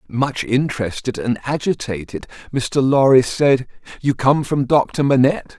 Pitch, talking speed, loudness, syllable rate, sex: 130 Hz, 130 wpm, -18 LUFS, 4.6 syllables/s, male